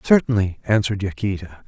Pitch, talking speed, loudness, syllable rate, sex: 105 Hz, 110 wpm, -21 LUFS, 6.0 syllables/s, male